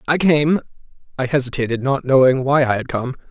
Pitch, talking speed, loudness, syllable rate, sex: 135 Hz, 165 wpm, -17 LUFS, 5.7 syllables/s, male